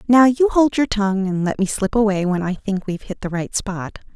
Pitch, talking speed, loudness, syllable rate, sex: 205 Hz, 260 wpm, -19 LUFS, 5.5 syllables/s, female